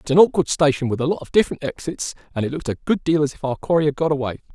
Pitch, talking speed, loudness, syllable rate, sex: 145 Hz, 315 wpm, -21 LUFS, 7.9 syllables/s, male